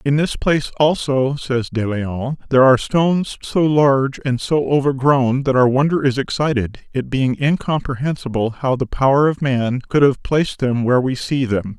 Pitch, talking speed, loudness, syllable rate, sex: 135 Hz, 185 wpm, -18 LUFS, 4.9 syllables/s, male